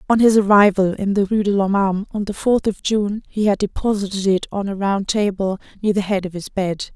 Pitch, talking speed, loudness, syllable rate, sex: 200 Hz, 240 wpm, -19 LUFS, 5.6 syllables/s, female